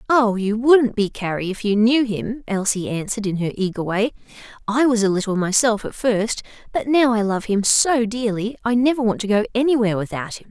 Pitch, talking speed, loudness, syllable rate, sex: 220 Hz, 210 wpm, -20 LUFS, 5.4 syllables/s, female